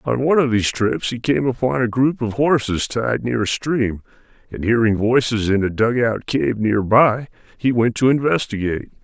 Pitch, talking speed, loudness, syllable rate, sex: 120 Hz, 195 wpm, -18 LUFS, 5.0 syllables/s, male